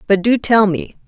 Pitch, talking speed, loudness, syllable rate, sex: 205 Hz, 225 wpm, -15 LUFS, 4.7 syllables/s, female